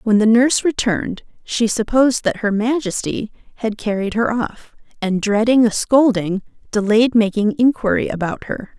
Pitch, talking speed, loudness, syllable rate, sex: 220 Hz, 150 wpm, -18 LUFS, 4.8 syllables/s, female